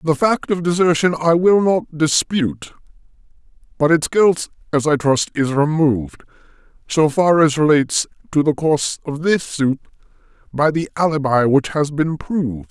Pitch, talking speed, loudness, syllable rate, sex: 155 Hz, 155 wpm, -17 LUFS, 3.8 syllables/s, male